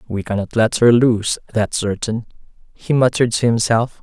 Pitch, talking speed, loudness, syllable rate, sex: 115 Hz, 165 wpm, -17 LUFS, 5.3 syllables/s, male